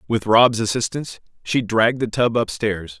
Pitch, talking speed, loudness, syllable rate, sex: 115 Hz, 160 wpm, -19 LUFS, 5.0 syllables/s, male